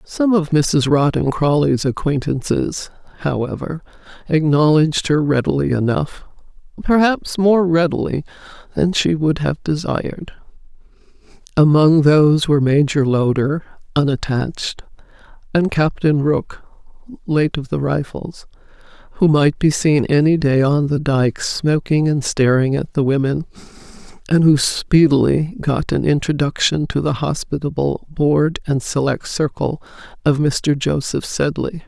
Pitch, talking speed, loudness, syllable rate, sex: 150 Hz, 120 wpm, -17 LUFS, 4.2 syllables/s, female